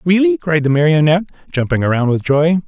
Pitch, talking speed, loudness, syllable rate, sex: 160 Hz, 180 wpm, -15 LUFS, 6.3 syllables/s, male